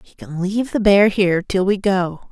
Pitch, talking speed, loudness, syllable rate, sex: 190 Hz, 235 wpm, -17 LUFS, 6.1 syllables/s, female